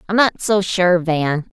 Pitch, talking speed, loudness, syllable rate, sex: 180 Hz, 195 wpm, -17 LUFS, 3.7 syllables/s, female